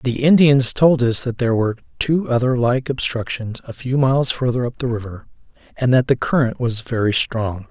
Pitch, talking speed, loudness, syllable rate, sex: 125 Hz, 195 wpm, -18 LUFS, 5.3 syllables/s, male